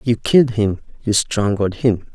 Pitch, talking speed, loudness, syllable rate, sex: 110 Hz, 170 wpm, -18 LUFS, 4.6 syllables/s, male